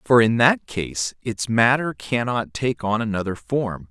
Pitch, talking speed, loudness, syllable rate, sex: 110 Hz, 170 wpm, -21 LUFS, 4.0 syllables/s, male